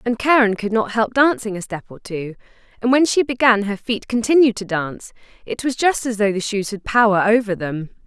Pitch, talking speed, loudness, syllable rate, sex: 220 Hz, 225 wpm, -18 LUFS, 5.4 syllables/s, female